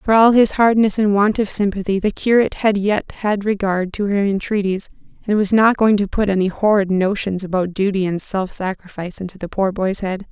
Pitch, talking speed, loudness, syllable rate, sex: 200 Hz, 210 wpm, -18 LUFS, 5.4 syllables/s, female